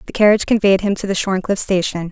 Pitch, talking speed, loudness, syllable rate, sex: 195 Hz, 225 wpm, -16 LUFS, 7.2 syllables/s, female